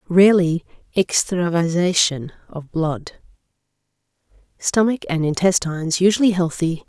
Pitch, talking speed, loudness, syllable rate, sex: 170 Hz, 80 wpm, -19 LUFS, 4.5 syllables/s, female